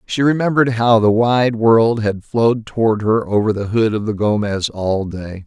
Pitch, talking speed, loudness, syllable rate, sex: 110 Hz, 200 wpm, -16 LUFS, 4.7 syllables/s, male